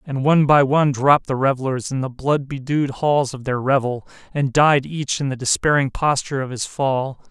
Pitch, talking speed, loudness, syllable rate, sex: 135 Hz, 205 wpm, -19 LUFS, 5.4 syllables/s, male